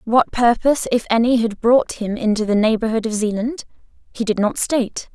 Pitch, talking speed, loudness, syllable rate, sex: 225 Hz, 185 wpm, -18 LUFS, 5.4 syllables/s, female